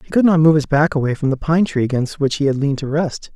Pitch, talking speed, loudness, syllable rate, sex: 150 Hz, 320 wpm, -17 LUFS, 6.5 syllables/s, male